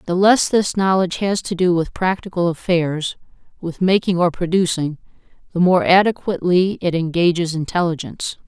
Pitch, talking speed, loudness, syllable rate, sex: 175 Hz, 140 wpm, -18 LUFS, 5.3 syllables/s, female